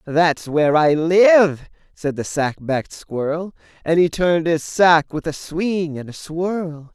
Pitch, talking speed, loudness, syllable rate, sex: 165 Hz, 175 wpm, -18 LUFS, 3.9 syllables/s, male